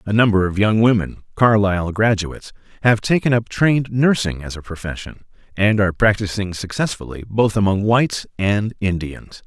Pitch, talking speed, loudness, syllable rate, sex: 105 Hz, 150 wpm, -18 LUFS, 5.3 syllables/s, male